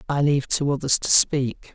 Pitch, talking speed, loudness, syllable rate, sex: 140 Hz, 205 wpm, -20 LUFS, 5.1 syllables/s, male